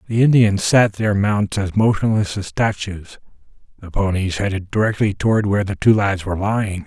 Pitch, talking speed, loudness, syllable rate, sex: 100 Hz, 175 wpm, -18 LUFS, 5.3 syllables/s, male